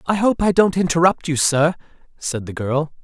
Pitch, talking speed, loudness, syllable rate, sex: 160 Hz, 200 wpm, -18 LUFS, 5.0 syllables/s, male